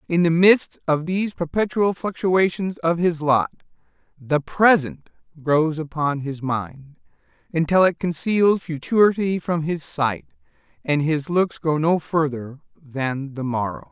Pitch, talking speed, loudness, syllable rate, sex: 160 Hz, 140 wpm, -21 LUFS, 4.0 syllables/s, male